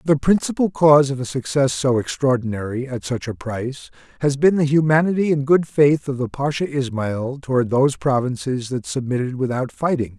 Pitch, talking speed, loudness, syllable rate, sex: 135 Hz, 175 wpm, -20 LUFS, 5.5 syllables/s, male